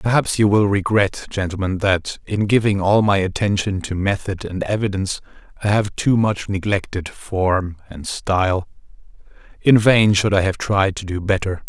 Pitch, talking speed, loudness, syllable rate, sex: 100 Hz, 165 wpm, -19 LUFS, 4.6 syllables/s, male